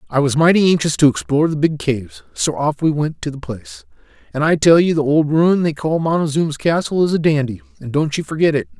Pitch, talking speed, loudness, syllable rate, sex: 150 Hz, 240 wpm, -17 LUFS, 6.0 syllables/s, male